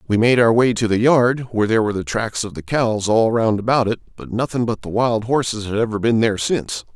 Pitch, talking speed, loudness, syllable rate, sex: 115 Hz, 260 wpm, -18 LUFS, 6.0 syllables/s, male